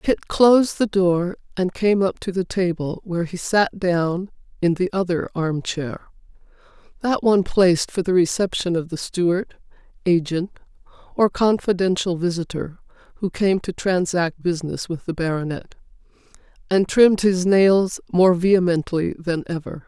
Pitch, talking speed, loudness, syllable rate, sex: 180 Hz, 140 wpm, -20 LUFS, 4.7 syllables/s, female